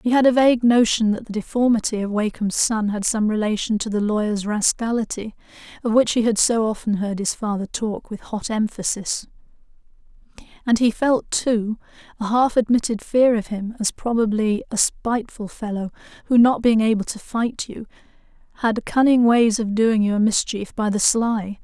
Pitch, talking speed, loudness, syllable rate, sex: 220 Hz, 175 wpm, -20 LUFS, 5.0 syllables/s, female